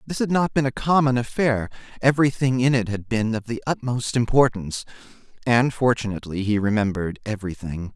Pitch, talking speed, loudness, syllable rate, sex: 120 Hz, 160 wpm, -22 LUFS, 5.9 syllables/s, male